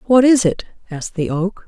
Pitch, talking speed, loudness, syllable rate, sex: 205 Hz, 215 wpm, -16 LUFS, 5.6 syllables/s, female